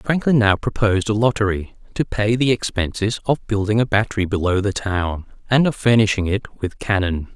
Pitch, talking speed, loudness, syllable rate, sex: 105 Hz, 180 wpm, -19 LUFS, 5.3 syllables/s, male